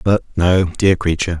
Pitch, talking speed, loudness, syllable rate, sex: 90 Hz, 170 wpm, -16 LUFS, 5.1 syllables/s, male